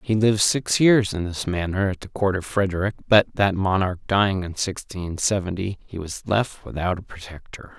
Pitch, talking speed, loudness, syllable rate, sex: 95 Hz, 195 wpm, -22 LUFS, 5.1 syllables/s, male